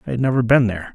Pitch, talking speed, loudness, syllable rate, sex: 120 Hz, 320 wpm, -18 LUFS, 8.6 syllables/s, male